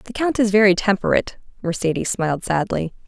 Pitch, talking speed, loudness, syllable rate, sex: 200 Hz, 155 wpm, -20 LUFS, 6.0 syllables/s, female